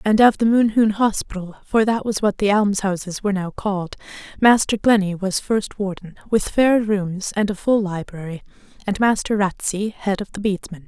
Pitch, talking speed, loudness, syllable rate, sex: 205 Hz, 175 wpm, -20 LUFS, 5.2 syllables/s, female